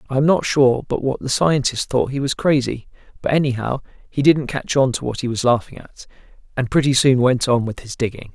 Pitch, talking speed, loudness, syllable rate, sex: 130 Hz, 230 wpm, -19 LUFS, 5.6 syllables/s, male